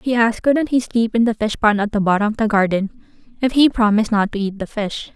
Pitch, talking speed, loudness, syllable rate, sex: 220 Hz, 270 wpm, -18 LUFS, 5.9 syllables/s, female